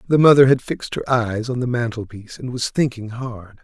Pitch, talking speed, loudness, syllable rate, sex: 120 Hz, 215 wpm, -19 LUFS, 5.8 syllables/s, male